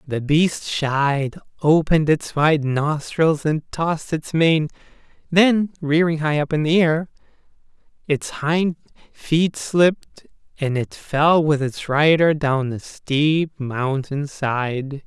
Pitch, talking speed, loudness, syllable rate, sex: 150 Hz, 130 wpm, -20 LUFS, 3.3 syllables/s, male